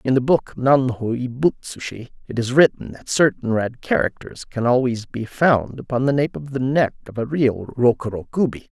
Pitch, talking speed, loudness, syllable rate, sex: 125 Hz, 205 wpm, -20 LUFS, 4.9 syllables/s, male